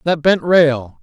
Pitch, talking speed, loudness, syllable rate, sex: 155 Hz, 175 wpm, -14 LUFS, 3.4 syllables/s, male